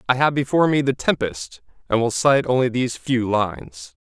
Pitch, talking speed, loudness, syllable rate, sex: 120 Hz, 195 wpm, -20 LUFS, 5.4 syllables/s, male